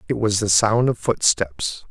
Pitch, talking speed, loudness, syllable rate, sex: 105 Hz, 190 wpm, -19 LUFS, 4.1 syllables/s, male